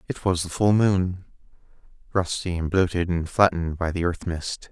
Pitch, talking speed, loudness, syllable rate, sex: 90 Hz, 180 wpm, -24 LUFS, 4.9 syllables/s, male